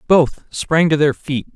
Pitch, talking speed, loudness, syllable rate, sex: 150 Hz, 190 wpm, -17 LUFS, 3.7 syllables/s, male